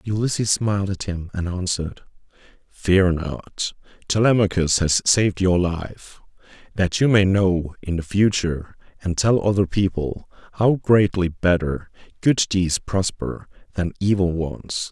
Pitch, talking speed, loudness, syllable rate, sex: 95 Hz, 130 wpm, -21 LUFS, 4.1 syllables/s, male